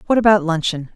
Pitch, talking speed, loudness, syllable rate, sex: 185 Hz, 190 wpm, -17 LUFS, 6.5 syllables/s, female